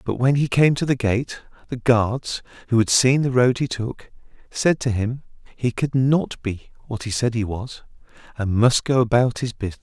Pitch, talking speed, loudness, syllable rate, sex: 120 Hz, 210 wpm, -21 LUFS, 4.7 syllables/s, male